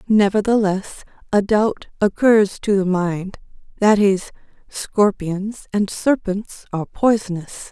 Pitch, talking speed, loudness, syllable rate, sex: 200 Hz, 100 wpm, -19 LUFS, 4.0 syllables/s, female